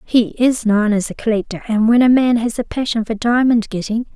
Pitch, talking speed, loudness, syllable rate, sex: 230 Hz, 230 wpm, -16 LUFS, 5.4 syllables/s, female